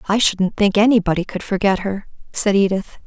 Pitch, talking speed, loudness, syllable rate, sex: 200 Hz, 175 wpm, -18 LUFS, 5.4 syllables/s, female